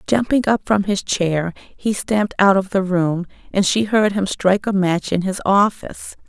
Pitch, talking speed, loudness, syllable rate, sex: 195 Hz, 200 wpm, -18 LUFS, 4.6 syllables/s, female